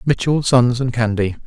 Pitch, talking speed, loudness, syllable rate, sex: 125 Hz, 165 wpm, -17 LUFS, 4.7 syllables/s, male